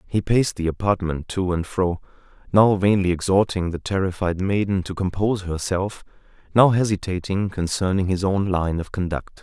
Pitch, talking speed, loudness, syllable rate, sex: 95 Hz, 155 wpm, -22 LUFS, 5.1 syllables/s, male